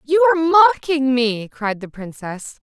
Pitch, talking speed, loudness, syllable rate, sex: 275 Hz, 155 wpm, -16 LUFS, 4.5 syllables/s, female